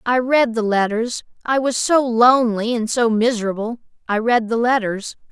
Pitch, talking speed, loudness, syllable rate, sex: 235 Hz, 160 wpm, -18 LUFS, 4.8 syllables/s, female